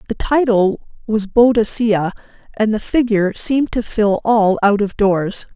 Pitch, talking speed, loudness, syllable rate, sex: 215 Hz, 150 wpm, -16 LUFS, 4.4 syllables/s, female